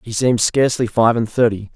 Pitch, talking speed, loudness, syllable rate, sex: 115 Hz, 205 wpm, -16 LUFS, 6.1 syllables/s, male